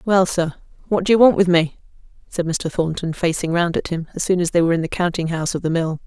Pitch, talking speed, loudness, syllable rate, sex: 170 Hz, 265 wpm, -19 LUFS, 6.4 syllables/s, female